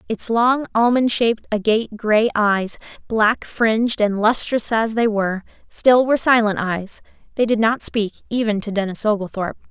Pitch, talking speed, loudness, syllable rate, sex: 220 Hz, 155 wpm, -19 LUFS, 4.9 syllables/s, female